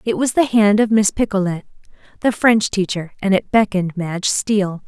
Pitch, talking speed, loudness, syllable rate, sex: 200 Hz, 185 wpm, -17 LUFS, 5.4 syllables/s, female